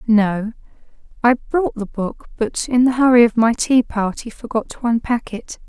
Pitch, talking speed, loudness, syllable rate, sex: 235 Hz, 180 wpm, -18 LUFS, 4.5 syllables/s, female